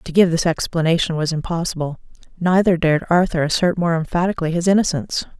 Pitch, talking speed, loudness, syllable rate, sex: 170 Hz, 155 wpm, -19 LUFS, 6.4 syllables/s, female